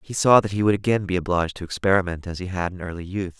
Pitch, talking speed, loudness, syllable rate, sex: 95 Hz, 285 wpm, -22 LUFS, 7.0 syllables/s, male